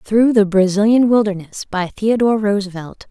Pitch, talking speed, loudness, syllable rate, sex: 205 Hz, 135 wpm, -15 LUFS, 5.2 syllables/s, female